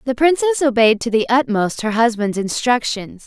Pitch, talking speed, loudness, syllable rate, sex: 240 Hz, 165 wpm, -17 LUFS, 5.1 syllables/s, female